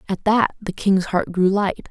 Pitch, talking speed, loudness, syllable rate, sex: 195 Hz, 220 wpm, -20 LUFS, 4.2 syllables/s, female